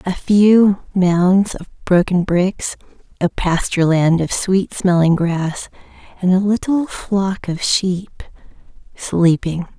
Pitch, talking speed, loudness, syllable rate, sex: 185 Hz, 125 wpm, -16 LUFS, 3.4 syllables/s, female